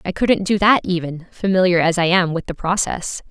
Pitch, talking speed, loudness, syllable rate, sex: 180 Hz, 220 wpm, -18 LUFS, 5.2 syllables/s, female